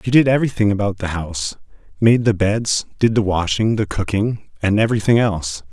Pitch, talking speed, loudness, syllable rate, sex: 105 Hz, 170 wpm, -18 LUFS, 5.9 syllables/s, male